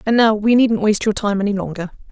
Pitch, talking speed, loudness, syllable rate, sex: 210 Hz, 255 wpm, -17 LUFS, 6.5 syllables/s, female